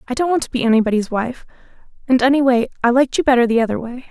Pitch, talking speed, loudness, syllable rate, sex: 250 Hz, 205 wpm, -17 LUFS, 7.6 syllables/s, female